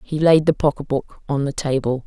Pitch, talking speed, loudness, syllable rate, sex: 145 Hz, 235 wpm, -20 LUFS, 5.2 syllables/s, female